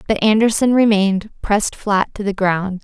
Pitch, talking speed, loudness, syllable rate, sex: 205 Hz, 170 wpm, -16 LUFS, 5.1 syllables/s, female